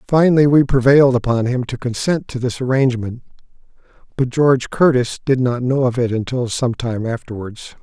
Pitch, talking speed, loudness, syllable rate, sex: 125 Hz, 170 wpm, -17 LUFS, 5.4 syllables/s, male